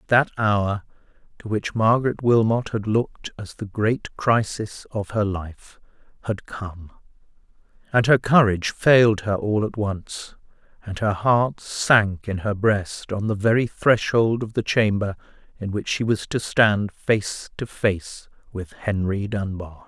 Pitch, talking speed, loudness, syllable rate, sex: 105 Hz, 155 wpm, -22 LUFS, 3.9 syllables/s, male